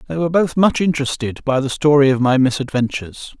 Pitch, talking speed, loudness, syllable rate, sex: 140 Hz, 195 wpm, -17 LUFS, 6.2 syllables/s, male